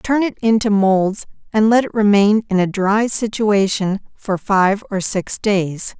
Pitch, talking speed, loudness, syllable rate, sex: 205 Hz, 170 wpm, -17 LUFS, 3.9 syllables/s, female